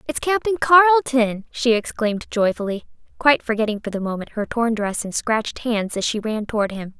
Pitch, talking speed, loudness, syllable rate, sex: 230 Hz, 190 wpm, -20 LUFS, 5.5 syllables/s, female